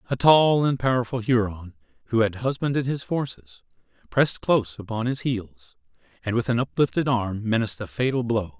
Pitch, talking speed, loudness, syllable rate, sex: 115 Hz, 170 wpm, -24 LUFS, 5.4 syllables/s, male